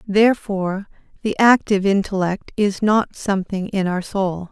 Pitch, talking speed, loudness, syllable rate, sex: 200 Hz, 135 wpm, -19 LUFS, 4.8 syllables/s, female